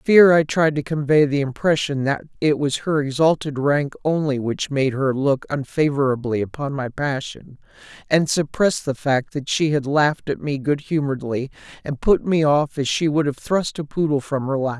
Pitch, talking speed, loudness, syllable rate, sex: 145 Hz, 200 wpm, -20 LUFS, 5.0 syllables/s, male